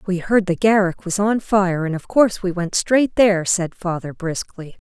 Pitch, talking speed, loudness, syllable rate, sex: 190 Hz, 210 wpm, -19 LUFS, 4.7 syllables/s, female